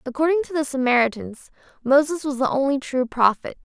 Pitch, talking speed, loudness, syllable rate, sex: 270 Hz, 160 wpm, -21 LUFS, 5.8 syllables/s, female